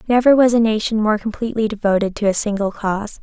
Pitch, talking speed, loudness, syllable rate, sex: 215 Hz, 205 wpm, -17 LUFS, 6.5 syllables/s, female